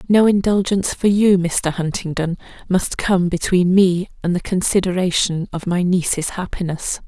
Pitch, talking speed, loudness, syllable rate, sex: 180 Hz, 145 wpm, -18 LUFS, 4.7 syllables/s, female